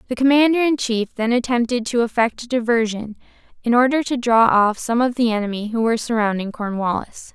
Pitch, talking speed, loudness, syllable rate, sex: 235 Hz, 190 wpm, -19 LUFS, 5.7 syllables/s, female